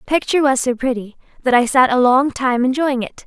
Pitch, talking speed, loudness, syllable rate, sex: 260 Hz, 240 wpm, -16 LUFS, 6.1 syllables/s, female